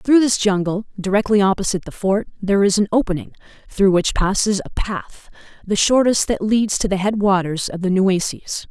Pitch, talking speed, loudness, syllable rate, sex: 200 Hz, 180 wpm, -18 LUFS, 5.3 syllables/s, female